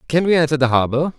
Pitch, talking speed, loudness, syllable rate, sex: 145 Hz, 255 wpm, -17 LUFS, 7.0 syllables/s, male